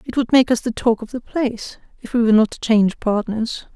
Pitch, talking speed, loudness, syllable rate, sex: 230 Hz, 255 wpm, -19 LUFS, 5.9 syllables/s, female